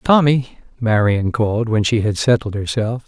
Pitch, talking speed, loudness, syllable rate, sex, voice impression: 115 Hz, 155 wpm, -17 LUFS, 4.9 syllables/s, male, very masculine, very adult-like, very middle-aged, thick, slightly relaxed, slightly weak, soft, muffled, slightly fluent, cool, intellectual, slightly refreshing, very sincere, very calm, slightly mature, very friendly, very reassuring, slightly unique, elegant, slightly wild, slightly sweet, kind, very modest